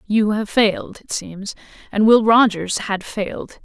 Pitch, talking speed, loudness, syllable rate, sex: 210 Hz, 165 wpm, -18 LUFS, 4.2 syllables/s, female